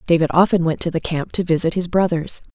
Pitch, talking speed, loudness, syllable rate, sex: 170 Hz, 235 wpm, -19 LUFS, 6.1 syllables/s, female